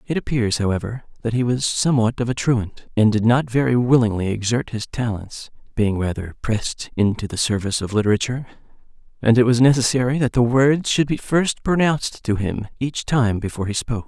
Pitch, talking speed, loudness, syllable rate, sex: 120 Hz, 190 wpm, -20 LUFS, 5.7 syllables/s, male